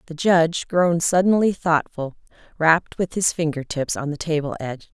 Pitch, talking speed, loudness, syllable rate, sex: 165 Hz, 170 wpm, -21 LUFS, 5.1 syllables/s, female